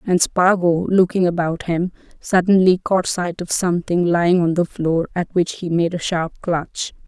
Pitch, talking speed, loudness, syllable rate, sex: 175 Hz, 180 wpm, -18 LUFS, 4.6 syllables/s, female